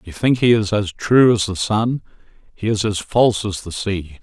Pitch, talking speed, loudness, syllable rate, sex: 105 Hz, 215 wpm, -18 LUFS, 4.9 syllables/s, male